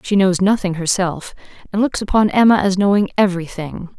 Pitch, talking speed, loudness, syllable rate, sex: 195 Hz, 180 wpm, -16 LUFS, 5.6 syllables/s, female